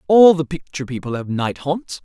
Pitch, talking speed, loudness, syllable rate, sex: 150 Hz, 205 wpm, -18 LUFS, 5.4 syllables/s, female